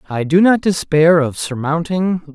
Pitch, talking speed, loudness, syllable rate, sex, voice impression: 165 Hz, 155 wpm, -15 LUFS, 4.2 syllables/s, male, masculine, adult-like, bright, slightly soft, clear, fluent, slightly cool, refreshing, friendly, lively, kind